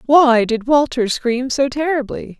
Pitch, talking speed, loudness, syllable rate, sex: 260 Hz, 150 wpm, -16 LUFS, 4.0 syllables/s, female